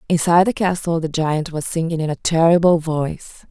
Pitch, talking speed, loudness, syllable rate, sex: 165 Hz, 190 wpm, -18 LUFS, 5.7 syllables/s, female